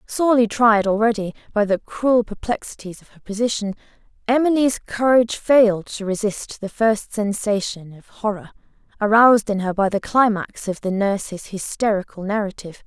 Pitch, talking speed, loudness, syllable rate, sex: 215 Hz, 145 wpm, -20 LUFS, 5.1 syllables/s, female